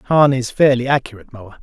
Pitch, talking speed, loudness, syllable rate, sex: 125 Hz, 185 wpm, -15 LUFS, 5.7 syllables/s, male